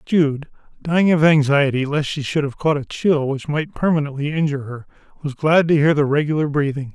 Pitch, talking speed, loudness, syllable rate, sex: 145 Hz, 200 wpm, -18 LUFS, 5.5 syllables/s, male